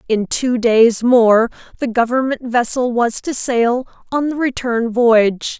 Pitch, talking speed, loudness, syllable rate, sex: 240 Hz, 150 wpm, -16 LUFS, 3.9 syllables/s, female